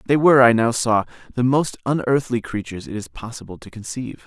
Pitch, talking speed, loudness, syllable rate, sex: 120 Hz, 195 wpm, -19 LUFS, 6.2 syllables/s, male